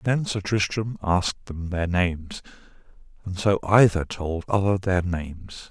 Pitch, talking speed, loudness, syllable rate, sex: 95 Hz, 160 wpm, -24 LUFS, 4.6 syllables/s, male